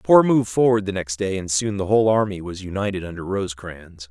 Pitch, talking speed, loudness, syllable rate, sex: 100 Hz, 235 wpm, -21 LUFS, 6.1 syllables/s, male